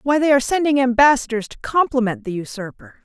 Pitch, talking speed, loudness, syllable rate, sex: 260 Hz, 180 wpm, -18 LUFS, 6.2 syllables/s, female